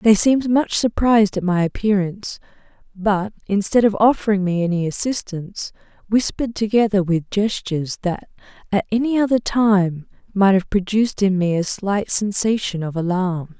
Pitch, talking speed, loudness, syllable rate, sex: 200 Hz, 145 wpm, -19 LUFS, 5.1 syllables/s, female